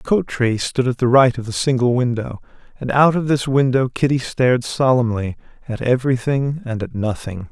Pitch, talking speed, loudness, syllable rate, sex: 125 Hz, 190 wpm, -18 LUFS, 5.3 syllables/s, male